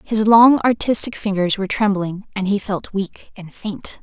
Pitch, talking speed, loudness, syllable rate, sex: 205 Hz, 180 wpm, -18 LUFS, 4.5 syllables/s, female